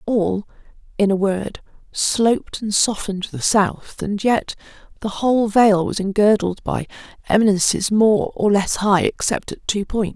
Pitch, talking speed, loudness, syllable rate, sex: 205 Hz, 160 wpm, -19 LUFS, 4.4 syllables/s, female